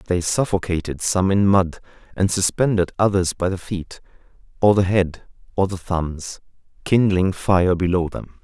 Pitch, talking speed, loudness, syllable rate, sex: 95 Hz, 150 wpm, -20 LUFS, 4.6 syllables/s, male